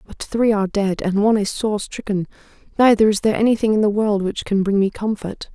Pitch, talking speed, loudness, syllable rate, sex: 210 Hz, 225 wpm, -19 LUFS, 5.9 syllables/s, female